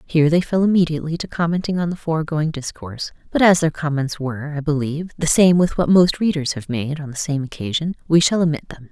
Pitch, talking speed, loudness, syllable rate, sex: 155 Hz, 220 wpm, -19 LUFS, 6.2 syllables/s, female